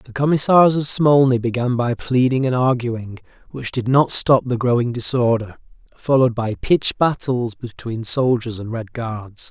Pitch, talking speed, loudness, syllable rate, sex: 125 Hz, 160 wpm, -18 LUFS, 4.6 syllables/s, male